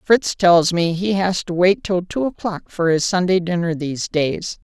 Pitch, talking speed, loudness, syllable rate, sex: 180 Hz, 205 wpm, -19 LUFS, 4.4 syllables/s, female